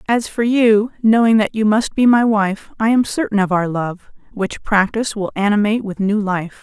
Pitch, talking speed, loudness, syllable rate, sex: 215 Hz, 210 wpm, -16 LUFS, 4.9 syllables/s, female